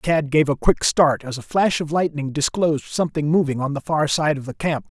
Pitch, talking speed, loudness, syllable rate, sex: 150 Hz, 240 wpm, -20 LUFS, 5.3 syllables/s, male